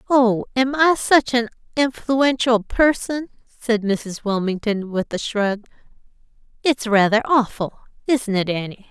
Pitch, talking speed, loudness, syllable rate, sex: 230 Hz, 120 wpm, -20 LUFS, 4.1 syllables/s, female